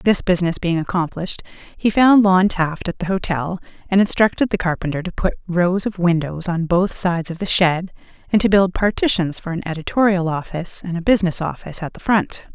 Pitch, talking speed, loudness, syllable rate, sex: 180 Hz, 195 wpm, -19 LUFS, 5.7 syllables/s, female